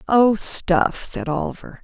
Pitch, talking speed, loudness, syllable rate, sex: 180 Hz, 130 wpm, -20 LUFS, 3.6 syllables/s, female